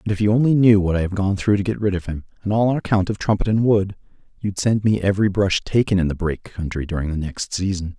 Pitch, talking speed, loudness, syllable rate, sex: 100 Hz, 255 wpm, -20 LUFS, 6.6 syllables/s, male